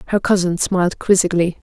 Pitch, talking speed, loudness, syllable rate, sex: 185 Hz, 140 wpm, -17 LUFS, 6.7 syllables/s, female